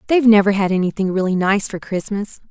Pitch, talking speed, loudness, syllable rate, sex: 200 Hz, 190 wpm, -17 LUFS, 6.3 syllables/s, female